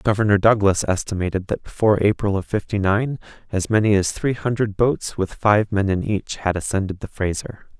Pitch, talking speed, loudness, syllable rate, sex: 100 Hz, 185 wpm, -20 LUFS, 5.3 syllables/s, male